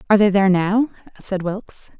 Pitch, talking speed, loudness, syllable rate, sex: 200 Hz, 180 wpm, -19 LUFS, 6.2 syllables/s, female